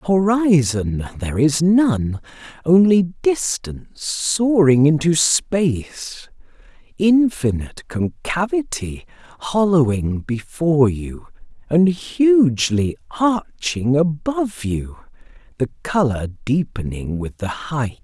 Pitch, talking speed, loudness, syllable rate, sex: 150 Hz, 75 wpm, -18 LUFS, 3.5 syllables/s, male